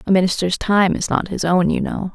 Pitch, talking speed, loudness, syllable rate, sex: 185 Hz, 250 wpm, -18 LUFS, 5.5 syllables/s, female